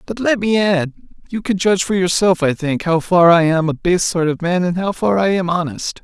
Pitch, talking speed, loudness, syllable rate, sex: 180 Hz, 260 wpm, -16 LUFS, 5.3 syllables/s, male